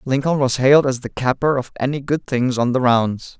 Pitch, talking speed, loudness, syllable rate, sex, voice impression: 130 Hz, 230 wpm, -18 LUFS, 5.3 syllables/s, male, very masculine, adult-like, slightly thick, tensed, slightly powerful, slightly bright, slightly hard, slightly muffled, fluent, cool, slightly intellectual, refreshing, sincere, very calm, slightly mature, friendly, reassuring, unique, slightly elegant, slightly wild, sweet, slightly lively, very kind, very modest